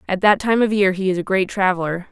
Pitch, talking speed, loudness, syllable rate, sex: 190 Hz, 285 wpm, -18 LUFS, 6.2 syllables/s, female